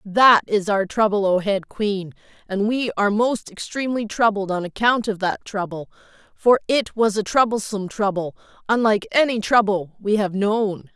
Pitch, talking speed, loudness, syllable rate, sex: 205 Hz, 165 wpm, -20 LUFS, 4.9 syllables/s, female